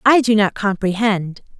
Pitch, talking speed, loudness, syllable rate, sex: 210 Hz, 150 wpm, -17 LUFS, 4.5 syllables/s, female